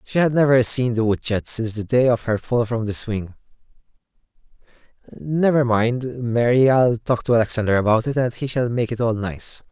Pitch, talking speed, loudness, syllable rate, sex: 120 Hz, 200 wpm, -19 LUFS, 5.2 syllables/s, male